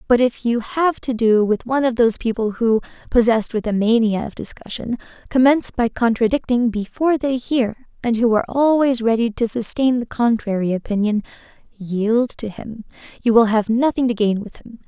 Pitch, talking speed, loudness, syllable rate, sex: 230 Hz, 180 wpm, -19 LUFS, 5.3 syllables/s, female